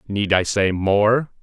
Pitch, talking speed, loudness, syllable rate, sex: 105 Hz, 170 wpm, -18 LUFS, 3.3 syllables/s, male